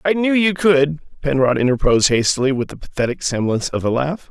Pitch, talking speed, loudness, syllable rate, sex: 145 Hz, 195 wpm, -18 LUFS, 6.0 syllables/s, male